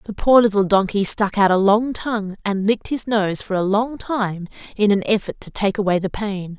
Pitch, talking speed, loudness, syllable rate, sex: 205 Hz, 230 wpm, -19 LUFS, 5.1 syllables/s, female